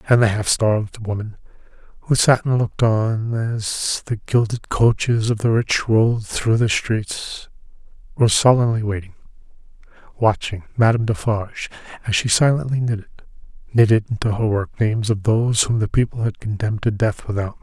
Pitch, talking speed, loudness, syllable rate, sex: 110 Hz, 155 wpm, -19 LUFS, 5.4 syllables/s, male